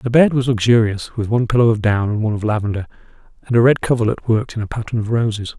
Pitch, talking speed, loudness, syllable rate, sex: 115 Hz, 245 wpm, -17 LUFS, 7.0 syllables/s, male